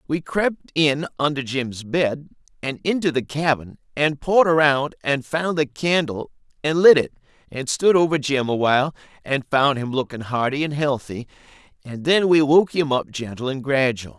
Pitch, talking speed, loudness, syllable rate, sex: 140 Hz, 175 wpm, -20 LUFS, 4.8 syllables/s, male